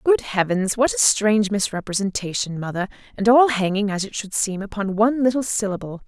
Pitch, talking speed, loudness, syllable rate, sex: 210 Hz, 180 wpm, -21 LUFS, 5.7 syllables/s, female